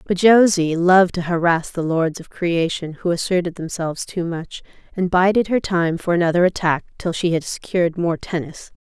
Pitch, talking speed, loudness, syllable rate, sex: 175 Hz, 185 wpm, -19 LUFS, 5.2 syllables/s, female